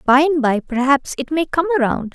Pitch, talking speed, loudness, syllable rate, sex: 285 Hz, 225 wpm, -17 LUFS, 4.8 syllables/s, female